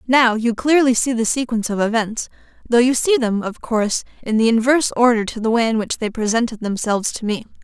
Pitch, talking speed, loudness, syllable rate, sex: 230 Hz, 220 wpm, -18 LUFS, 5.9 syllables/s, female